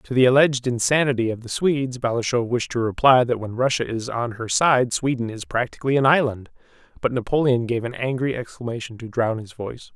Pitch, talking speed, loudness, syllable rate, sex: 125 Hz, 200 wpm, -21 LUFS, 5.8 syllables/s, male